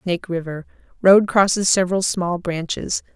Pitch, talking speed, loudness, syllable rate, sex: 180 Hz, 115 wpm, -19 LUFS, 4.9 syllables/s, female